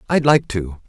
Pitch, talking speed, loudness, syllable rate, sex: 120 Hz, 205 wpm, -18 LUFS, 4.6 syllables/s, male